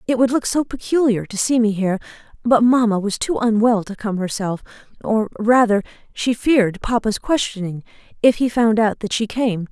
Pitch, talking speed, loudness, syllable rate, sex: 225 Hz, 180 wpm, -19 LUFS, 5.2 syllables/s, female